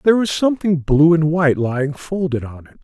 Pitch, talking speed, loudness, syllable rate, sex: 160 Hz, 210 wpm, -17 LUFS, 6.0 syllables/s, male